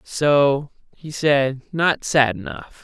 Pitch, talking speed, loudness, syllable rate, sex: 140 Hz, 125 wpm, -19 LUFS, 2.9 syllables/s, male